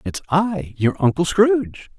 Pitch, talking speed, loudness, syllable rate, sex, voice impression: 165 Hz, 150 wpm, -19 LUFS, 4.1 syllables/s, male, masculine, adult-like, slightly refreshing, slightly calm, friendly